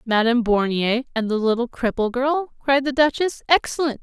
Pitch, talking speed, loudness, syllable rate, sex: 250 Hz, 165 wpm, -20 LUFS, 5.2 syllables/s, female